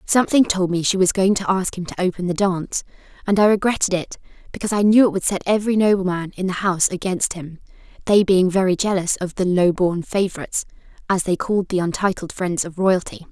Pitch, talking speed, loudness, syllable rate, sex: 185 Hz, 210 wpm, -19 LUFS, 6.2 syllables/s, female